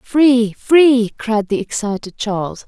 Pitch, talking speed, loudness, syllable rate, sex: 225 Hz, 135 wpm, -16 LUFS, 3.5 syllables/s, female